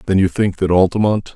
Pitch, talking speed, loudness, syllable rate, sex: 95 Hz, 220 wpm, -16 LUFS, 5.9 syllables/s, male